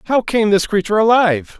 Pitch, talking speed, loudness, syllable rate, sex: 205 Hz, 190 wpm, -15 LUFS, 6.4 syllables/s, male